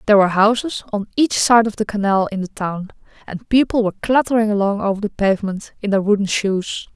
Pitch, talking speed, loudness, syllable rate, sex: 205 Hz, 205 wpm, -18 LUFS, 6.0 syllables/s, female